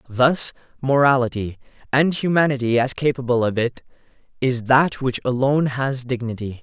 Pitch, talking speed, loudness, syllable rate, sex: 130 Hz, 125 wpm, -20 LUFS, 4.9 syllables/s, male